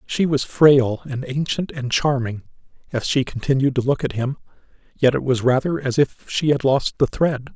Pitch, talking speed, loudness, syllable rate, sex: 135 Hz, 200 wpm, -20 LUFS, 4.8 syllables/s, male